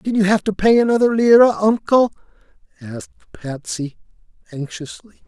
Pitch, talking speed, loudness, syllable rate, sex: 195 Hz, 125 wpm, -16 LUFS, 5.2 syllables/s, male